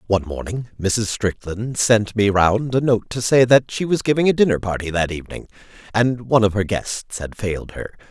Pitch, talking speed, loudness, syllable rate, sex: 110 Hz, 205 wpm, -19 LUFS, 5.3 syllables/s, male